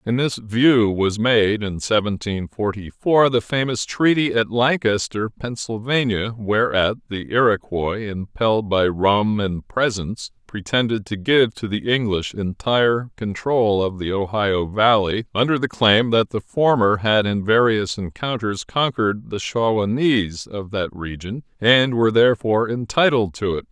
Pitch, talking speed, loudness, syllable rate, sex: 110 Hz, 145 wpm, -20 LUFS, 4.3 syllables/s, male